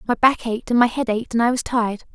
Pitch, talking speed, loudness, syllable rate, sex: 235 Hz, 310 wpm, -20 LUFS, 6.4 syllables/s, female